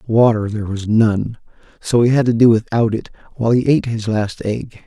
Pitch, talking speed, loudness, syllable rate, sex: 115 Hz, 210 wpm, -16 LUFS, 5.5 syllables/s, male